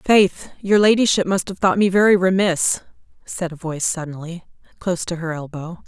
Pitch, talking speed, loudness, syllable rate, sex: 180 Hz, 175 wpm, -19 LUFS, 5.2 syllables/s, female